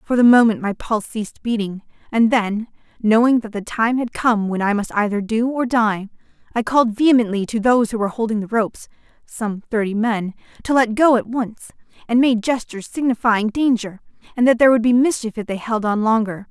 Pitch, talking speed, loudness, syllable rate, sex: 225 Hz, 205 wpm, -18 LUFS, 5.6 syllables/s, female